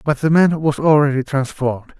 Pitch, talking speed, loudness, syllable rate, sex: 145 Hz, 180 wpm, -16 LUFS, 5.3 syllables/s, male